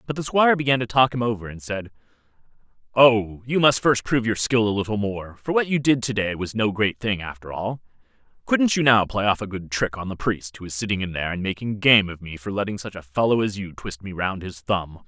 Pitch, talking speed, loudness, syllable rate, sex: 105 Hz, 260 wpm, -22 LUFS, 5.8 syllables/s, male